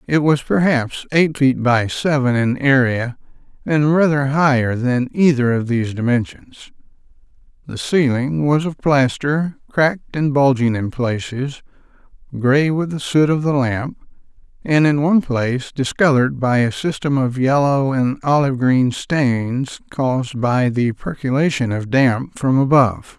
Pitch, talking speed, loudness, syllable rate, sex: 135 Hz, 145 wpm, -17 LUFS, 4.3 syllables/s, male